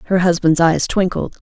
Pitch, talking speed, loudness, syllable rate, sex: 175 Hz, 160 wpm, -16 LUFS, 5.0 syllables/s, female